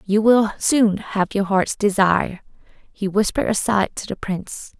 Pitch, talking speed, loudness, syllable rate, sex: 205 Hz, 165 wpm, -19 LUFS, 4.7 syllables/s, female